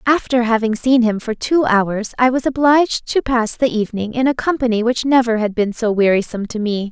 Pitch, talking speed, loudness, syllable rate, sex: 235 Hz, 215 wpm, -17 LUFS, 5.5 syllables/s, female